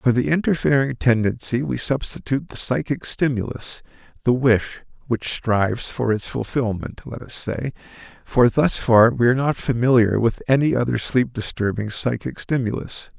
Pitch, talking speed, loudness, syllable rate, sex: 120 Hz, 150 wpm, -21 LUFS, 4.9 syllables/s, male